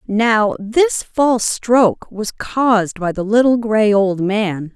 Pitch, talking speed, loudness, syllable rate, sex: 215 Hz, 150 wpm, -16 LUFS, 3.5 syllables/s, female